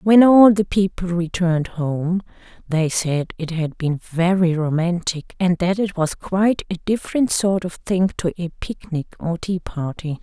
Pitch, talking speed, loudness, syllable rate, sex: 175 Hz, 175 wpm, -20 LUFS, 4.3 syllables/s, female